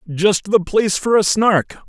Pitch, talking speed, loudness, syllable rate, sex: 195 Hz, 190 wpm, -16 LUFS, 4.4 syllables/s, male